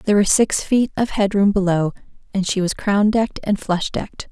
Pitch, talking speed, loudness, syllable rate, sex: 200 Hz, 220 wpm, -19 LUFS, 5.5 syllables/s, female